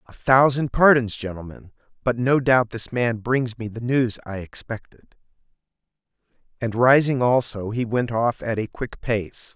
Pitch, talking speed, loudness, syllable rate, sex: 120 Hz, 155 wpm, -21 LUFS, 4.3 syllables/s, male